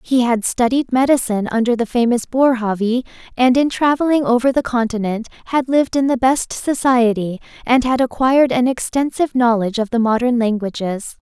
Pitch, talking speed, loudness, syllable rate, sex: 245 Hz, 160 wpm, -17 LUFS, 5.5 syllables/s, female